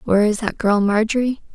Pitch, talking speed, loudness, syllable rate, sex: 215 Hz, 195 wpm, -19 LUFS, 6.1 syllables/s, female